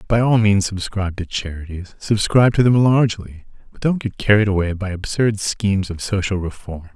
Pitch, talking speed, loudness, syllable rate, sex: 100 Hz, 165 wpm, -18 LUFS, 5.5 syllables/s, male